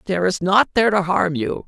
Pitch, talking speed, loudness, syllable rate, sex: 185 Hz, 250 wpm, -18 LUFS, 6.2 syllables/s, male